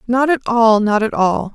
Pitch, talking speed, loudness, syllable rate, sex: 225 Hz, 195 wpm, -15 LUFS, 4.4 syllables/s, female